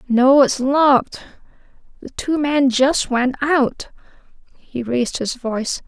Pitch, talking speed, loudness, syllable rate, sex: 265 Hz, 125 wpm, -17 LUFS, 3.8 syllables/s, female